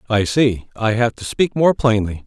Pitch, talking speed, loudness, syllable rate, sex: 115 Hz, 210 wpm, -18 LUFS, 4.6 syllables/s, male